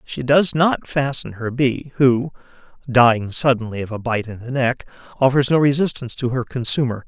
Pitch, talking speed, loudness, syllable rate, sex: 125 Hz, 180 wpm, -19 LUFS, 5.2 syllables/s, male